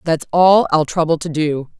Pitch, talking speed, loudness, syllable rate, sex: 160 Hz, 200 wpm, -15 LUFS, 4.6 syllables/s, female